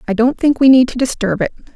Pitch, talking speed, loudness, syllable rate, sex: 245 Hz, 275 wpm, -14 LUFS, 6.4 syllables/s, female